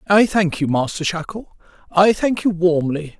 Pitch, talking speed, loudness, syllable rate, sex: 180 Hz, 150 wpm, -18 LUFS, 4.5 syllables/s, male